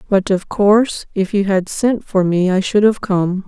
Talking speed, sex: 225 wpm, female